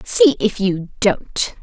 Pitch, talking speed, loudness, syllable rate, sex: 205 Hz, 150 wpm, -17 LUFS, 3.0 syllables/s, female